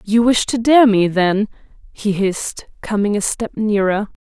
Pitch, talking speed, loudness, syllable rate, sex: 210 Hz, 170 wpm, -17 LUFS, 4.4 syllables/s, female